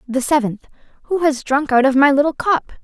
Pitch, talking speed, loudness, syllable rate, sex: 280 Hz, 210 wpm, -16 LUFS, 5.5 syllables/s, female